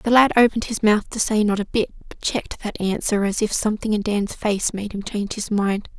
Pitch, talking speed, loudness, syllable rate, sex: 210 Hz, 250 wpm, -21 LUFS, 5.7 syllables/s, female